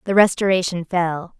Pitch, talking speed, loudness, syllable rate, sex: 180 Hz, 130 wpm, -19 LUFS, 4.8 syllables/s, female